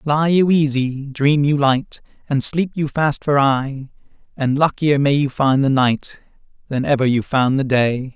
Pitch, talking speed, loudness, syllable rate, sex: 140 Hz, 185 wpm, -17 LUFS, 4.1 syllables/s, male